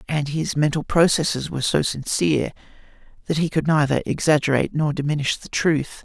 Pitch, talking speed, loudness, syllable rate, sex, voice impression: 150 Hz, 160 wpm, -21 LUFS, 5.7 syllables/s, male, masculine, adult-like, slightly relaxed, slightly weak, slightly halting, raspy, slightly sincere, calm, friendly, kind, modest